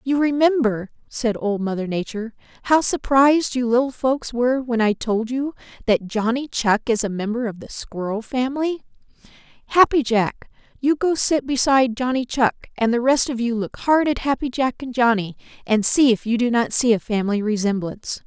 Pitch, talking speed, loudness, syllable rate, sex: 240 Hz, 185 wpm, -20 LUFS, 5.2 syllables/s, female